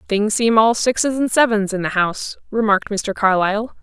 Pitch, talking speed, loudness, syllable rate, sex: 215 Hz, 190 wpm, -17 LUFS, 5.5 syllables/s, female